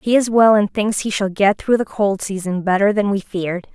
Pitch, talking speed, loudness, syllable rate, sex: 200 Hz, 255 wpm, -17 LUFS, 5.3 syllables/s, female